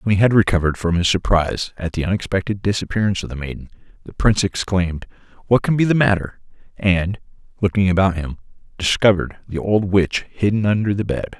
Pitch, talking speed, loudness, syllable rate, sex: 95 Hz, 180 wpm, -19 LUFS, 6.3 syllables/s, male